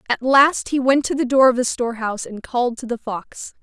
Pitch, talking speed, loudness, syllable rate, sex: 250 Hz, 250 wpm, -19 LUFS, 5.6 syllables/s, female